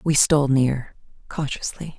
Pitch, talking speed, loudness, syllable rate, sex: 140 Hz, 120 wpm, -21 LUFS, 4.5 syllables/s, female